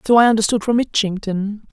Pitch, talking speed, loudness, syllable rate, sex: 215 Hz, 175 wpm, -17 LUFS, 6.0 syllables/s, female